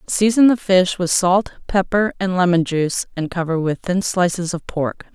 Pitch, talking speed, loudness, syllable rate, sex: 185 Hz, 185 wpm, -18 LUFS, 4.8 syllables/s, female